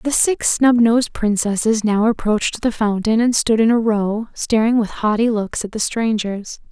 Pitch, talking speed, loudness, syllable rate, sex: 220 Hz, 180 wpm, -17 LUFS, 4.6 syllables/s, female